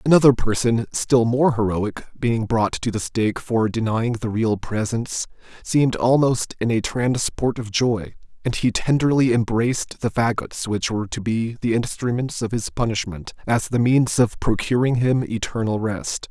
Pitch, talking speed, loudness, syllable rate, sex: 115 Hz, 165 wpm, -21 LUFS, 4.6 syllables/s, male